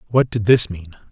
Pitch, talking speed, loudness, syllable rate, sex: 105 Hz, 215 wpm, -17 LUFS, 6.3 syllables/s, male